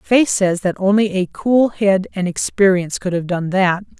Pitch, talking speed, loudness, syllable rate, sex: 195 Hz, 195 wpm, -17 LUFS, 4.6 syllables/s, female